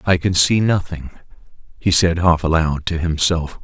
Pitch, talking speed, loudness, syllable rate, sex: 85 Hz, 165 wpm, -17 LUFS, 4.5 syllables/s, male